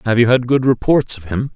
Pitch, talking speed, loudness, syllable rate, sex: 120 Hz, 270 wpm, -15 LUFS, 5.6 syllables/s, male